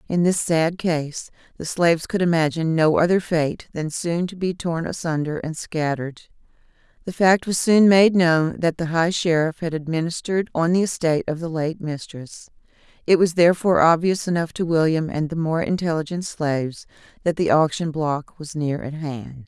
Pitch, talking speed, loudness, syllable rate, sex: 165 Hz, 180 wpm, -21 LUFS, 5.0 syllables/s, female